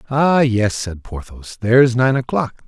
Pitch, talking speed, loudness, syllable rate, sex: 120 Hz, 180 wpm, -16 LUFS, 4.7 syllables/s, male